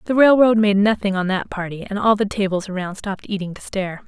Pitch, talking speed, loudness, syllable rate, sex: 200 Hz, 235 wpm, -19 LUFS, 6.2 syllables/s, female